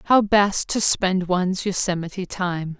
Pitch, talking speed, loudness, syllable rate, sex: 185 Hz, 150 wpm, -21 LUFS, 4.3 syllables/s, female